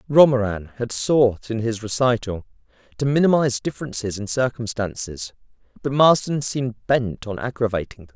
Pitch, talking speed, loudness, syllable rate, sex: 120 Hz, 130 wpm, -21 LUFS, 5.3 syllables/s, male